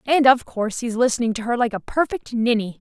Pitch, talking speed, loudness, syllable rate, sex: 235 Hz, 230 wpm, -21 LUFS, 5.9 syllables/s, female